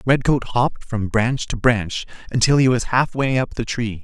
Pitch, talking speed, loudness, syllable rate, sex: 120 Hz, 195 wpm, -20 LUFS, 4.6 syllables/s, male